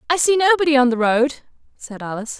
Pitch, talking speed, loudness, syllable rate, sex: 275 Hz, 200 wpm, -17 LUFS, 6.4 syllables/s, female